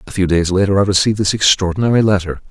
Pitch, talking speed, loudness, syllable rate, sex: 100 Hz, 215 wpm, -14 LUFS, 7.4 syllables/s, male